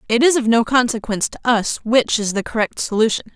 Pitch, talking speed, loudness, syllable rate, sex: 230 Hz, 215 wpm, -18 LUFS, 5.9 syllables/s, female